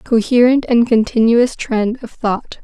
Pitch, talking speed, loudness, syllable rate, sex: 235 Hz, 135 wpm, -15 LUFS, 3.9 syllables/s, female